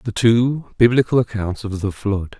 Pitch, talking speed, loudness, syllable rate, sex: 110 Hz, 175 wpm, -18 LUFS, 4.4 syllables/s, male